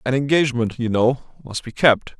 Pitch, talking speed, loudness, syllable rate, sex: 125 Hz, 190 wpm, -19 LUFS, 5.5 syllables/s, male